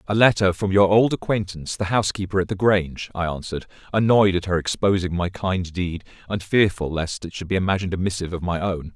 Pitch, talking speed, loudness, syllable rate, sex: 95 Hz, 215 wpm, -22 LUFS, 6.2 syllables/s, male